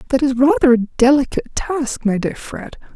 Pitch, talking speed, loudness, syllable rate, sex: 255 Hz, 185 wpm, -16 LUFS, 5.2 syllables/s, female